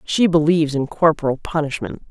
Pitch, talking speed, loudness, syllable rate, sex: 150 Hz, 145 wpm, -18 LUFS, 5.6 syllables/s, female